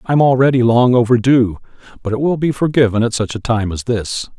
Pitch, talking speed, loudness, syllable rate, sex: 120 Hz, 205 wpm, -15 LUFS, 5.5 syllables/s, male